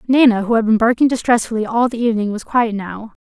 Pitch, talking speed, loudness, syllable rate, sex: 225 Hz, 220 wpm, -16 LUFS, 6.4 syllables/s, female